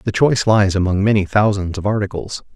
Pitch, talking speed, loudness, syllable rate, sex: 100 Hz, 190 wpm, -17 LUFS, 6.0 syllables/s, male